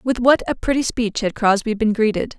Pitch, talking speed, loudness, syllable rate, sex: 230 Hz, 225 wpm, -19 LUFS, 5.2 syllables/s, female